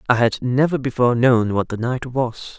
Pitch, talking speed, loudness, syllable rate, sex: 125 Hz, 210 wpm, -19 LUFS, 5.0 syllables/s, male